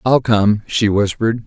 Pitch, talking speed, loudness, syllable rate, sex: 110 Hz, 165 wpm, -16 LUFS, 4.5 syllables/s, male